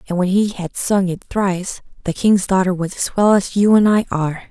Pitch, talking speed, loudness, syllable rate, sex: 190 Hz, 240 wpm, -17 LUFS, 5.3 syllables/s, female